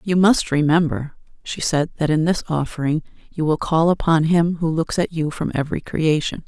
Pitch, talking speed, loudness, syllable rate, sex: 160 Hz, 195 wpm, -20 LUFS, 5.1 syllables/s, female